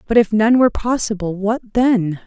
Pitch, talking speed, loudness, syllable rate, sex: 220 Hz, 160 wpm, -17 LUFS, 5.1 syllables/s, female